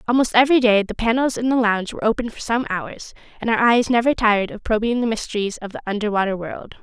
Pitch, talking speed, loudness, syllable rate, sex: 225 Hz, 230 wpm, -19 LUFS, 6.7 syllables/s, female